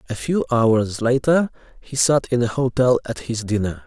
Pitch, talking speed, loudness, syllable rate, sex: 120 Hz, 185 wpm, -20 LUFS, 4.6 syllables/s, male